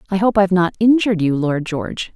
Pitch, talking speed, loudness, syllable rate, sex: 185 Hz, 250 wpm, -17 LUFS, 6.4 syllables/s, female